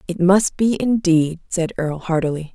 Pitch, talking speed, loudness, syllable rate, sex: 175 Hz, 165 wpm, -19 LUFS, 4.9 syllables/s, female